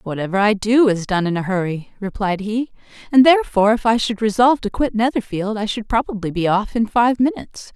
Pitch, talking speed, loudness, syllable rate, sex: 215 Hz, 210 wpm, -18 LUFS, 5.8 syllables/s, female